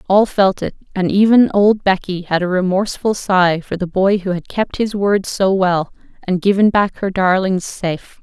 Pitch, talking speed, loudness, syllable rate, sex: 190 Hz, 195 wpm, -16 LUFS, 4.6 syllables/s, female